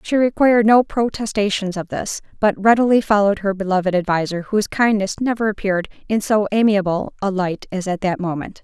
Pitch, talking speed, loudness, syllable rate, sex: 205 Hz, 175 wpm, -18 LUFS, 5.8 syllables/s, female